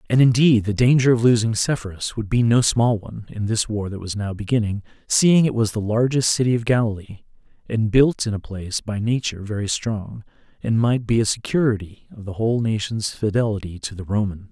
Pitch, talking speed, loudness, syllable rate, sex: 110 Hz, 200 wpm, -20 LUFS, 5.2 syllables/s, male